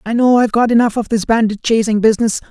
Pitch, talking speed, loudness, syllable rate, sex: 225 Hz, 240 wpm, -14 LUFS, 6.8 syllables/s, male